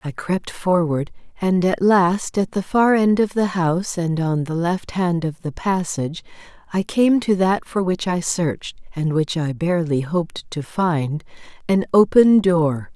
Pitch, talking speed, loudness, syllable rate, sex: 175 Hz, 175 wpm, -20 LUFS, 4.2 syllables/s, female